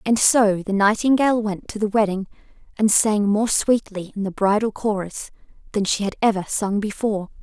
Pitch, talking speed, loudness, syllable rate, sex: 210 Hz, 180 wpm, -20 LUFS, 5.2 syllables/s, female